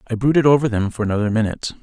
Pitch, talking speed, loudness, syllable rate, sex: 120 Hz, 230 wpm, -18 LUFS, 7.9 syllables/s, male